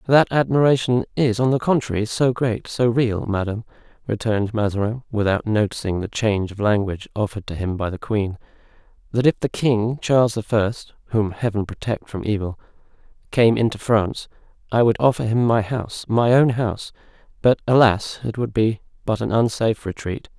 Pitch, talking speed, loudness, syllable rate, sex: 110 Hz, 160 wpm, -21 LUFS, 5.6 syllables/s, male